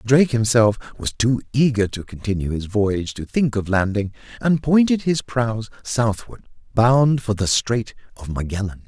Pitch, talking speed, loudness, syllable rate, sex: 115 Hz, 160 wpm, -20 LUFS, 4.7 syllables/s, male